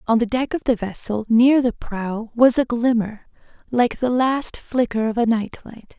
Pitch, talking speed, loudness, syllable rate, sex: 235 Hz, 200 wpm, -20 LUFS, 4.4 syllables/s, female